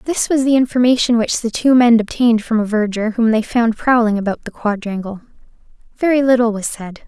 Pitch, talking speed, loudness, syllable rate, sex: 230 Hz, 195 wpm, -16 LUFS, 5.7 syllables/s, female